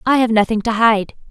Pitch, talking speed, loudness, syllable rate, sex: 225 Hz, 230 wpm, -15 LUFS, 5.6 syllables/s, female